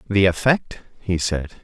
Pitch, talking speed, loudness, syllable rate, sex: 95 Hz, 145 wpm, -20 LUFS, 3.8 syllables/s, male